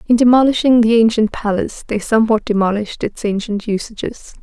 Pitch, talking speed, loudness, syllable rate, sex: 220 Hz, 150 wpm, -16 LUFS, 6.0 syllables/s, female